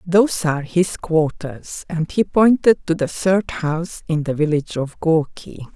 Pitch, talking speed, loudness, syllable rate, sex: 165 Hz, 165 wpm, -19 LUFS, 4.3 syllables/s, female